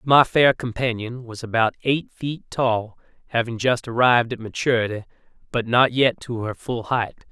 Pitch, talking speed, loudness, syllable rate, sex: 120 Hz, 165 wpm, -21 LUFS, 4.7 syllables/s, male